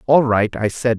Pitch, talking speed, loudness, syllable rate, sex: 120 Hz, 245 wpm, -17 LUFS, 4.8 syllables/s, male